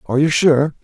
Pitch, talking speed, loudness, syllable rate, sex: 145 Hz, 215 wpm, -15 LUFS, 6.2 syllables/s, male